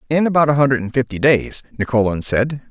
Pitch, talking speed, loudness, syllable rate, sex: 130 Hz, 200 wpm, -17 LUFS, 6.1 syllables/s, male